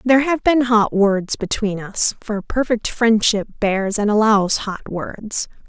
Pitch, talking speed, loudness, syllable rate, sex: 215 Hz, 160 wpm, -18 LUFS, 3.8 syllables/s, female